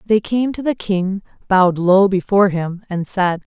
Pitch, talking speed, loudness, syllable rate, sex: 195 Hz, 185 wpm, -17 LUFS, 4.5 syllables/s, female